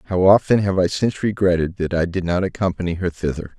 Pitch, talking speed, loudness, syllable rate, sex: 90 Hz, 215 wpm, -19 LUFS, 6.2 syllables/s, male